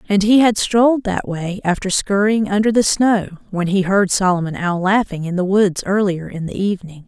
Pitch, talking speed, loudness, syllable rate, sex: 195 Hz, 205 wpm, -17 LUFS, 5.2 syllables/s, female